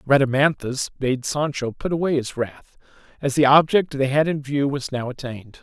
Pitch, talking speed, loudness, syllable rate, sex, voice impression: 140 Hz, 180 wpm, -21 LUFS, 5.1 syllables/s, male, very masculine, middle-aged, slightly thick, tensed, slightly powerful, very bright, soft, clear, fluent, slightly raspy, cool, intellectual, very refreshing, sincere, calm, mature, very friendly, very reassuring, unique, elegant, wild, slightly sweet, lively, very kind, slightly intense